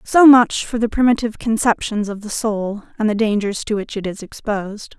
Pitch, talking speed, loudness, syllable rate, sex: 215 Hz, 205 wpm, -18 LUFS, 5.3 syllables/s, female